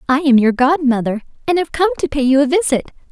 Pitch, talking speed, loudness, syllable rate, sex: 285 Hz, 230 wpm, -15 LUFS, 6.1 syllables/s, female